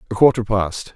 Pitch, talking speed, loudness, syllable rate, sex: 105 Hz, 190 wpm, -18 LUFS, 5.5 syllables/s, male